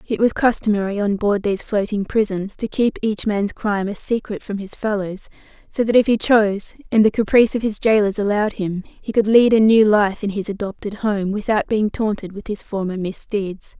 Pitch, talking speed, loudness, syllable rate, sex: 210 Hz, 210 wpm, -19 LUFS, 5.4 syllables/s, female